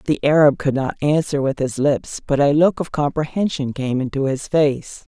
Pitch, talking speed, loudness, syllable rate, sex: 145 Hz, 200 wpm, -19 LUFS, 4.7 syllables/s, female